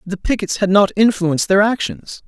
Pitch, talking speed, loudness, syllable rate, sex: 200 Hz, 185 wpm, -16 LUFS, 5.1 syllables/s, male